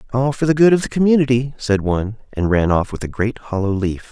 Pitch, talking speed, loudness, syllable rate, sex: 120 Hz, 250 wpm, -18 LUFS, 6.0 syllables/s, male